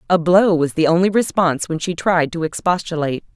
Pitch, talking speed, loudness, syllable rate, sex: 170 Hz, 195 wpm, -17 LUFS, 5.8 syllables/s, female